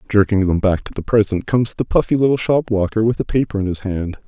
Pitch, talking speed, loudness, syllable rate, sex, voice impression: 105 Hz, 255 wpm, -18 LUFS, 6.3 syllables/s, male, very masculine, adult-like, thick, slightly fluent, cool, slightly calm, sweet, slightly kind